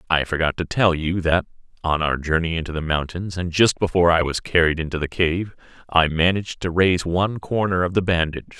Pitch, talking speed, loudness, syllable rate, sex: 85 Hz, 210 wpm, -21 LUFS, 6.0 syllables/s, male